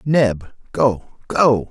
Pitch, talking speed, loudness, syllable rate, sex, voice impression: 120 Hz, 105 wpm, -18 LUFS, 2.2 syllables/s, male, masculine, middle-aged, slightly relaxed, slightly powerful, slightly hard, fluent, slightly raspy, cool, calm, slightly mature, slightly reassuring, wild, slightly strict, slightly modest